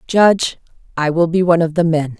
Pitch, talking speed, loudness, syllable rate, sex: 165 Hz, 220 wpm, -15 LUFS, 6.0 syllables/s, female